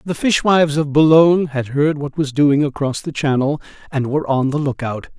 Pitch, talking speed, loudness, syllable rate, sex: 145 Hz, 195 wpm, -17 LUFS, 5.3 syllables/s, male